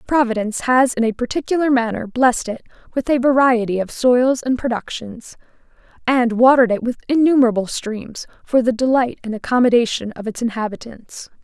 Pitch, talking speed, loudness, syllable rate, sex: 240 Hz, 150 wpm, -18 LUFS, 5.6 syllables/s, female